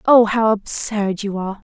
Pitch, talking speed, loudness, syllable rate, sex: 210 Hz, 175 wpm, -18 LUFS, 4.6 syllables/s, female